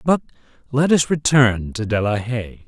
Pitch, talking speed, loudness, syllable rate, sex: 120 Hz, 180 wpm, -19 LUFS, 4.5 syllables/s, male